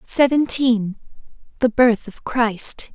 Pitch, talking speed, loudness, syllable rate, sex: 235 Hz, 100 wpm, -19 LUFS, 3.2 syllables/s, female